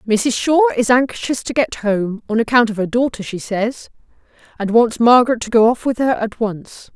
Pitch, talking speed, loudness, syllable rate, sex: 230 Hz, 190 wpm, -16 LUFS, 5.0 syllables/s, female